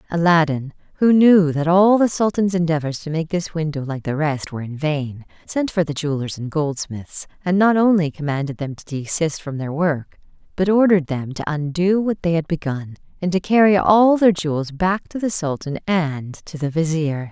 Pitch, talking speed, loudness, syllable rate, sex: 165 Hz, 200 wpm, -19 LUFS, 5.0 syllables/s, female